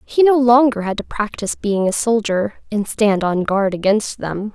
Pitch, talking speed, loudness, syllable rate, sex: 215 Hz, 200 wpm, -17 LUFS, 4.7 syllables/s, female